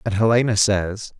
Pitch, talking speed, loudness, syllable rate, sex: 105 Hz, 150 wpm, -19 LUFS, 4.8 syllables/s, male